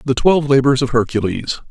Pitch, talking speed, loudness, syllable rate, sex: 130 Hz, 175 wpm, -16 LUFS, 6.0 syllables/s, male